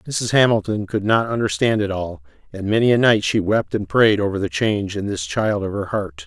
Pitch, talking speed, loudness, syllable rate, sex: 105 Hz, 230 wpm, -19 LUFS, 5.2 syllables/s, male